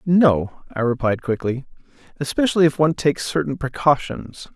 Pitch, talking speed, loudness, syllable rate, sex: 145 Hz, 130 wpm, -20 LUFS, 5.4 syllables/s, male